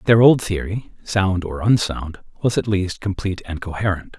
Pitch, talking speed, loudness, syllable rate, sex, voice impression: 95 Hz, 170 wpm, -20 LUFS, 4.8 syllables/s, male, very masculine, adult-like, cool, slightly calm, slightly sweet